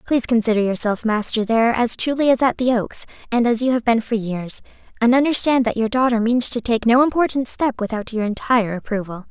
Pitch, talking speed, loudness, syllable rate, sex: 235 Hz, 215 wpm, -19 LUFS, 5.9 syllables/s, female